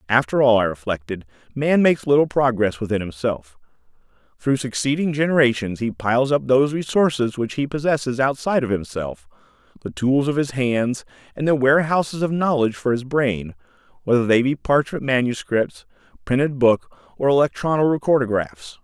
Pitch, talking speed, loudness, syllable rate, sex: 125 Hz, 145 wpm, -20 LUFS, 5.5 syllables/s, male